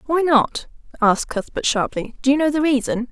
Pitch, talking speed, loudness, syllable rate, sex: 270 Hz, 195 wpm, -19 LUFS, 5.4 syllables/s, female